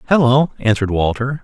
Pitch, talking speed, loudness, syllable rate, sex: 125 Hz, 125 wpm, -16 LUFS, 6.0 syllables/s, male